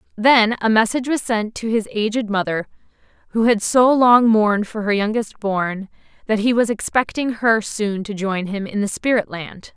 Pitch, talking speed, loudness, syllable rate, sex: 220 Hz, 190 wpm, -18 LUFS, 4.8 syllables/s, female